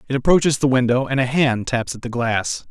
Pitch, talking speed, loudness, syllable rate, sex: 125 Hz, 245 wpm, -19 LUFS, 5.6 syllables/s, male